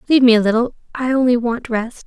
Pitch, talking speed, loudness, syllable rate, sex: 240 Hz, 205 wpm, -17 LUFS, 6.5 syllables/s, female